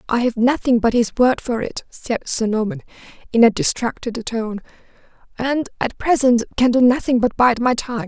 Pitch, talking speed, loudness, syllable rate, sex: 240 Hz, 185 wpm, -18 LUFS, 4.9 syllables/s, female